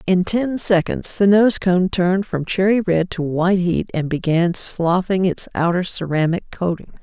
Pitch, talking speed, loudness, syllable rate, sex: 175 Hz, 170 wpm, -18 LUFS, 4.4 syllables/s, female